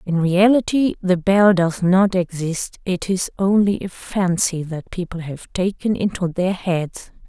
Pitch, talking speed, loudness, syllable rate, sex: 185 Hz, 155 wpm, -19 LUFS, 3.9 syllables/s, female